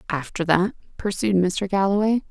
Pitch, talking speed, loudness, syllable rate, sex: 190 Hz, 130 wpm, -22 LUFS, 4.8 syllables/s, female